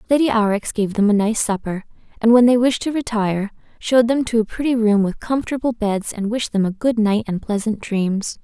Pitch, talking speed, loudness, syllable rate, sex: 220 Hz, 220 wpm, -19 LUFS, 5.6 syllables/s, female